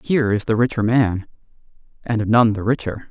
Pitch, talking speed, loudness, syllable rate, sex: 110 Hz, 155 wpm, -19 LUFS, 5.4 syllables/s, male